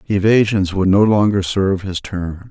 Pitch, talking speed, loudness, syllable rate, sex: 100 Hz, 170 wpm, -16 LUFS, 4.6 syllables/s, male